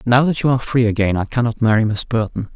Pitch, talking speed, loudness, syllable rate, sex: 115 Hz, 260 wpm, -17 LUFS, 6.6 syllables/s, male